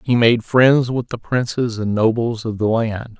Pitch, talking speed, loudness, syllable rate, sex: 115 Hz, 205 wpm, -18 LUFS, 4.2 syllables/s, male